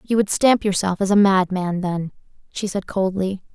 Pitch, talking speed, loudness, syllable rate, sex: 195 Hz, 185 wpm, -20 LUFS, 4.7 syllables/s, female